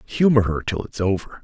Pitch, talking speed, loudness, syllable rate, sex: 105 Hz, 210 wpm, -21 LUFS, 5.4 syllables/s, male